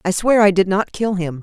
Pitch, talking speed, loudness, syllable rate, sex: 195 Hz, 295 wpm, -16 LUFS, 5.3 syllables/s, female